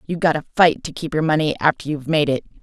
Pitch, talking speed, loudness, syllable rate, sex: 155 Hz, 275 wpm, -19 LUFS, 6.7 syllables/s, female